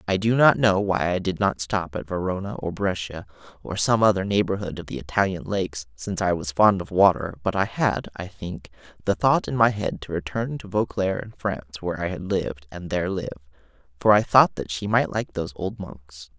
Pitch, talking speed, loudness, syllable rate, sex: 90 Hz, 220 wpm, -23 LUFS, 5.5 syllables/s, male